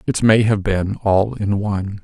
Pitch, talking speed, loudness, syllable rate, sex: 100 Hz, 205 wpm, -18 LUFS, 4.2 syllables/s, male